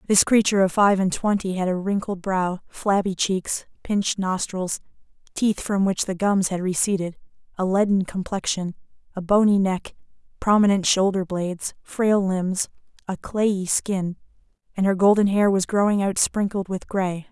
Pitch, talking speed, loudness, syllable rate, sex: 190 Hz, 155 wpm, -22 LUFS, 4.6 syllables/s, female